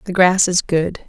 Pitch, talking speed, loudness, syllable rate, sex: 180 Hz, 220 wpm, -16 LUFS, 4.3 syllables/s, female